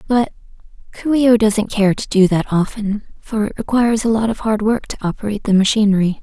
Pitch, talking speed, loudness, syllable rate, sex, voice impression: 215 Hz, 210 wpm, -17 LUFS, 6.0 syllables/s, female, very feminine, slightly young, soft, cute, calm, friendly, slightly sweet, kind